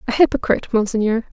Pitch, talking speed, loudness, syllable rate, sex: 230 Hz, 130 wpm, -18 LUFS, 7.0 syllables/s, female